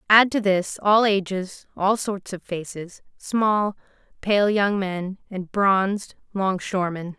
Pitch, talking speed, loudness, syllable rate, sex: 195 Hz, 135 wpm, -22 LUFS, 3.7 syllables/s, female